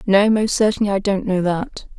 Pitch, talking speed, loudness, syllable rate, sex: 200 Hz, 210 wpm, -18 LUFS, 5.1 syllables/s, female